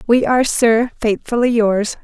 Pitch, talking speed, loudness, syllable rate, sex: 230 Hz, 145 wpm, -15 LUFS, 4.5 syllables/s, female